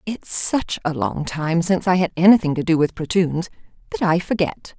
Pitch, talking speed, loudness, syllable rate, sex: 170 Hz, 200 wpm, -19 LUFS, 5.1 syllables/s, female